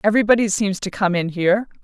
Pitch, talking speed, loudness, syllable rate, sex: 200 Hz, 195 wpm, -19 LUFS, 6.9 syllables/s, female